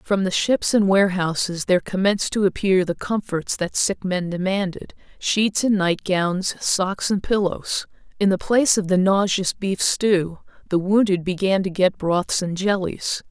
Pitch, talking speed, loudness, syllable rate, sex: 190 Hz, 160 wpm, -21 LUFS, 4.4 syllables/s, female